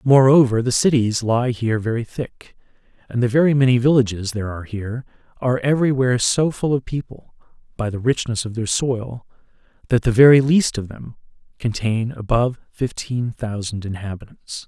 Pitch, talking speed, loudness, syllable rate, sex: 120 Hz, 160 wpm, -19 LUFS, 5.4 syllables/s, male